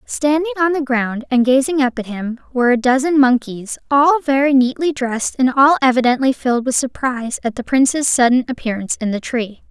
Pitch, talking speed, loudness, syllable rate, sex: 260 Hz, 190 wpm, -16 LUFS, 5.5 syllables/s, female